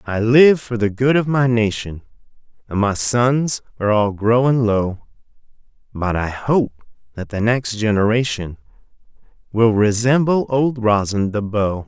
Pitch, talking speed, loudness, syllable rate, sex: 115 Hz, 140 wpm, -18 LUFS, 4.2 syllables/s, male